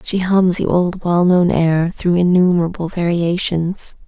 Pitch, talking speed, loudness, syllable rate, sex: 175 Hz, 130 wpm, -16 LUFS, 4.1 syllables/s, female